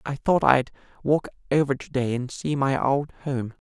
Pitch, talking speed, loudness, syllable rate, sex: 135 Hz, 180 wpm, -24 LUFS, 4.6 syllables/s, male